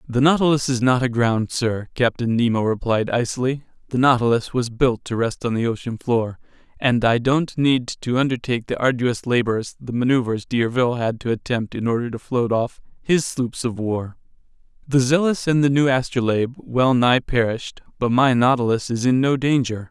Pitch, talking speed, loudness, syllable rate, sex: 125 Hz, 180 wpm, -20 LUFS, 5.1 syllables/s, male